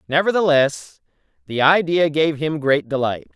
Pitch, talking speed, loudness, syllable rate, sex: 150 Hz, 125 wpm, -18 LUFS, 4.6 syllables/s, male